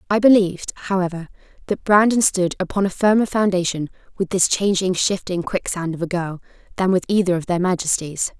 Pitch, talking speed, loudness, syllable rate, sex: 185 Hz, 170 wpm, -19 LUFS, 5.7 syllables/s, female